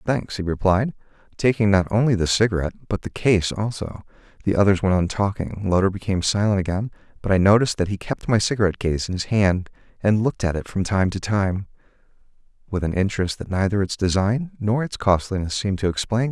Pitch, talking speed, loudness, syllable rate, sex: 100 Hz, 200 wpm, -22 LUFS, 6.1 syllables/s, male